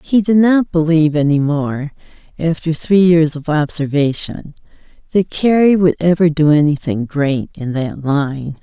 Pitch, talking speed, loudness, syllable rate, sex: 160 Hz, 145 wpm, -15 LUFS, 4.3 syllables/s, female